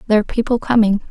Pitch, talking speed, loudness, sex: 220 Hz, 215 wpm, -16 LUFS, female